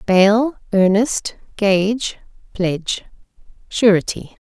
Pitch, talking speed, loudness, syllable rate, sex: 205 Hz, 65 wpm, -18 LUFS, 3.1 syllables/s, female